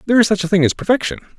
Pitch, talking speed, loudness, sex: 205 Hz, 305 wpm, -16 LUFS, male